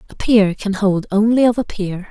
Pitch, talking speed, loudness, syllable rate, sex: 205 Hz, 230 wpm, -16 LUFS, 4.8 syllables/s, female